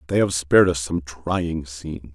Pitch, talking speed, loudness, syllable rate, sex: 80 Hz, 195 wpm, -21 LUFS, 5.0 syllables/s, male